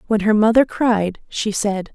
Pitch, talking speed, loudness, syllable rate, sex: 220 Hz, 185 wpm, -18 LUFS, 4.1 syllables/s, female